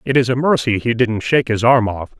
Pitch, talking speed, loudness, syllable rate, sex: 120 Hz, 275 wpm, -16 LUFS, 5.9 syllables/s, male